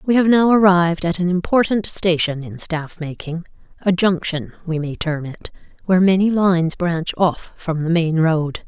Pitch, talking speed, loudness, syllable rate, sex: 175 Hz, 180 wpm, -18 LUFS, 4.6 syllables/s, female